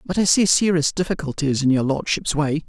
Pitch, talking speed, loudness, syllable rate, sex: 155 Hz, 200 wpm, -20 LUFS, 5.5 syllables/s, male